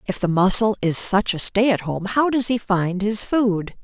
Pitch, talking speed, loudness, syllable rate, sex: 205 Hz, 235 wpm, -19 LUFS, 4.4 syllables/s, female